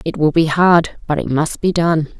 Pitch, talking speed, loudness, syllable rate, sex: 160 Hz, 245 wpm, -16 LUFS, 4.6 syllables/s, female